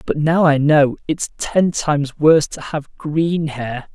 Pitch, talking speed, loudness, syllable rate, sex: 150 Hz, 185 wpm, -17 LUFS, 3.9 syllables/s, male